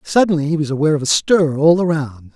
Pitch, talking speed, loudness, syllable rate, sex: 155 Hz, 230 wpm, -16 LUFS, 6.2 syllables/s, male